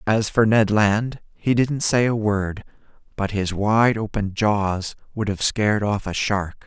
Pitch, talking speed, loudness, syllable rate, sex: 105 Hz, 180 wpm, -21 LUFS, 3.9 syllables/s, male